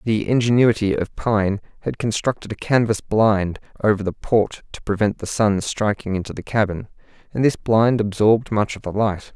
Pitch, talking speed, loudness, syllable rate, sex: 105 Hz, 180 wpm, -20 LUFS, 5.0 syllables/s, male